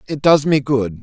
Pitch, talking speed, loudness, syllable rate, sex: 135 Hz, 235 wpm, -15 LUFS, 4.7 syllables/s, male